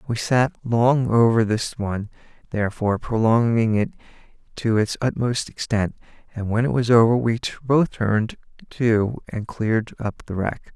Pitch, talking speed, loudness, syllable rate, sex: 115 Hz, 150 wpm, -21 LUFS, 4.7 syllables/s, male